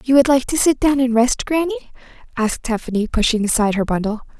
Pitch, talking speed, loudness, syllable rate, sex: 245 Hz, 205 wpm, -18 LUFS, 6.6 syllables/s, female